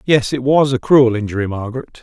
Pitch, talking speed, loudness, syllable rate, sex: 125 Hz, 205 wpm, -15 LUFS, 5.8 syllables/s, male